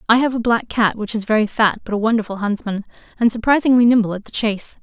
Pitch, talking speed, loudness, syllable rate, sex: 220 Hz, 235 wpm, -18 LUFS, 6.5 syllables/s, female